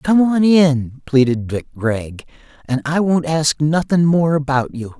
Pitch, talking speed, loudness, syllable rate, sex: 145 Hz, 170 wpm, -16 LUFS, 4.2 syllables/s, male